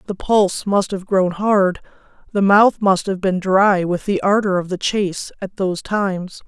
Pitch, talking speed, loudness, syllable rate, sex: 195 Hz, 195 wpm, -18 LUFS, 4.6 syllables/s, female